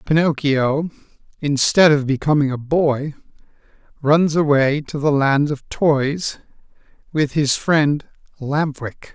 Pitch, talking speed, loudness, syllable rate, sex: 145 Hz, 120 wpm, -18 LUFS, 3.7 syllables/s, male